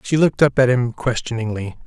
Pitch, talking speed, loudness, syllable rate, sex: 125 Hz, 195 wpm, -19 LUFS, 5.9 syllables/s, male